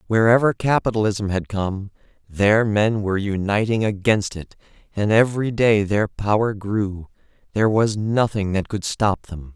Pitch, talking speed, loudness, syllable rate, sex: 105 Hz, 140 wpm, -20 LUFS, 4.6 syllables/s, male